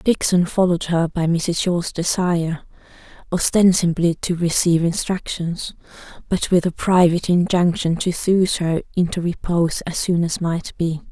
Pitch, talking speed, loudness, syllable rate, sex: 175 Hz, 140 wpm, -19 LUFS, 4.8 syllables/s, female